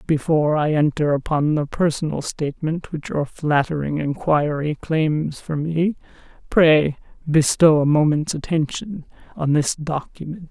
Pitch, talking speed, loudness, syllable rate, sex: 155 Hz, 125 wpm, -20 LUFS, 4.3 syllables/s, female